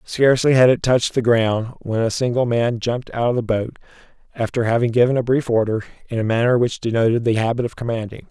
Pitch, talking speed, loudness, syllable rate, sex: 120 Hz, 215 wpm, -19 LUFS, 6.2 syllables/s, male